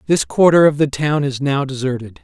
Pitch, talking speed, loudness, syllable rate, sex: 140 Hz, 215 wpm, -16 LUFS, 5.4 syllables/s, male